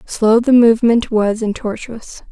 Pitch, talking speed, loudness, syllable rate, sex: 225 Hz, 155 wpm, -14 LUFS, 4.2 syllables/s, female